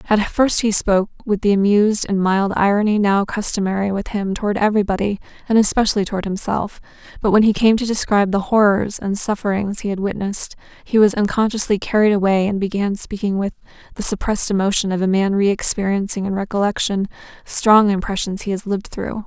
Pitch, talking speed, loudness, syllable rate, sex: 200 Hz, 180 wpm, -18 LUFS, 6.0 syllables/s, female